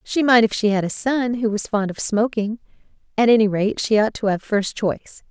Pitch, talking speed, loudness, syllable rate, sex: 220 Hz, 240 wpm, -20 LUFS, 5.2 syllables/s, female